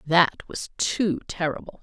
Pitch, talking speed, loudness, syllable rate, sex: 170 Hz, 130 wpm, -25 LUFS, 4.0 syllables/s, female